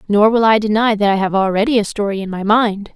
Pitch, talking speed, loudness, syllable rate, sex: 210 Hz, 265 wpm, -15 LUFS, 6.1 syllables/s, female